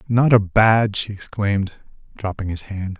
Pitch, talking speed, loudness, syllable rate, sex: 100 Hz, 160 wpm, -20 LUFS, 4.4 syllables/s, male